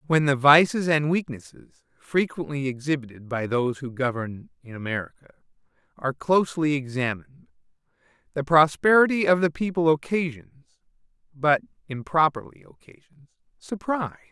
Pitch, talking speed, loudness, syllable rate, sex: 150 Hz, 100 wpm, -23 LUFS, 5.4 syllables/s, male